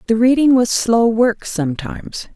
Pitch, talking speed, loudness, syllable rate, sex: 225 Hz, 155 wpm, -15 LUFS, 4.7 syllables/s, female